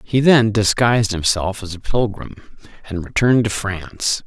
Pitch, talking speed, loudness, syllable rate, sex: 105 Hz, 155 wpm, -18 LUFS, 4.7 syllables/s, male